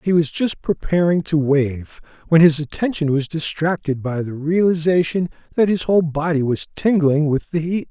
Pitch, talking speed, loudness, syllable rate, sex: 160 Hz, 175 wpm, -19 LUFS, 4.9 syllables/s, male